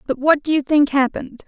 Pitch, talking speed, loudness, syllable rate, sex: 285 Hz, 245 wpm, -17 LUFS, 6.0 syllables/s, female